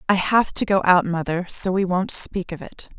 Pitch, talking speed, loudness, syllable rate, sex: 185 Hz, 240 wpm, -20 LUFS, 4.9 syllables/s, female